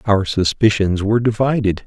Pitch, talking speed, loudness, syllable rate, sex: 105 Hz, 130 wpm, -17 LUFS, 5.1 syllables/s, male